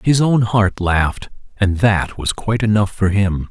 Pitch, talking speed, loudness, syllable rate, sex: 100 Hz, 190 wpm, -17 LUFS, 4.4 syllables/s, male